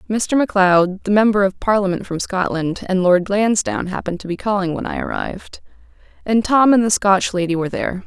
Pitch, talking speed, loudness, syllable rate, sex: 200 Hz, 195 wpm, -17 LUFS, 5.7 syllables/s, female